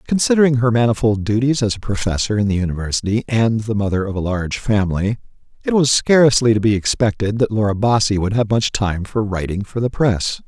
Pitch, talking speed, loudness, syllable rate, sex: 110 Hz, 200 wpm, -17 LUFS, 5.9 syllables/s, male